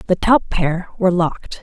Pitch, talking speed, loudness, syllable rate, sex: 180 Hz, 185 wpm, -18 LUFS, 5.1 syllables/s, female